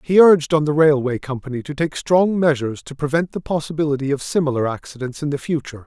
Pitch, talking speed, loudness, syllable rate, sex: 150 Hz, 205 wpm, -19 LUFS, 6.4 syllables/s, male